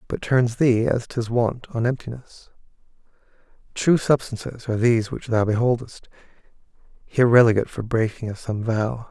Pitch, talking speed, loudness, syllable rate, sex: 120 Hz, 145 wpm, -21 LUFS, 5.2 syllables/s, male